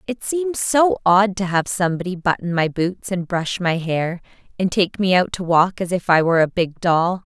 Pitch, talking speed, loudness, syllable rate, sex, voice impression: 185 Hz, 220 wpm, -19 LUFS, 4.8 syllables/s, female, feminine, slightly adult-like, clear, slightly cute, slightly friendly, slightly lively